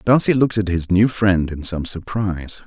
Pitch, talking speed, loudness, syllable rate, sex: 95 Hz, 205 wpm, -19 LUFS, 5.1 syllables/s, male